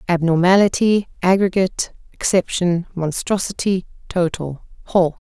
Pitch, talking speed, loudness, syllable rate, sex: 180 Hz, 70 wpm, -19 LUFS, 4.7 syllables/s, female